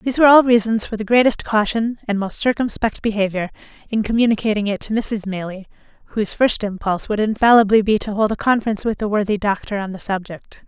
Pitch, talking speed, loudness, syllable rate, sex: 215 Hz, 195 wpm, -18 LUFS, 6.3 syllables/s, female